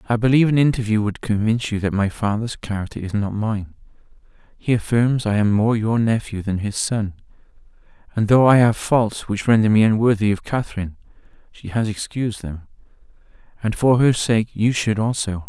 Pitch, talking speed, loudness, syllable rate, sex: 110 Hz, 180 wpm, -19 LUFS, 5.5 syllables/s, male